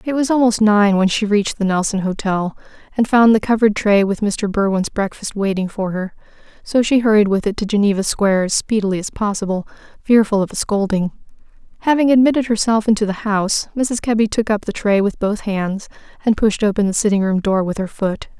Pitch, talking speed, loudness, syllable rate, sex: 210 Hz, 205 wpm, -17 LUFS, 5.7 syllables/s, female